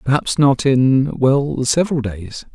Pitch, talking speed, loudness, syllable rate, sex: 135 Hz, 120 wpm, -16 LUFS, 3.8 syllables/s, male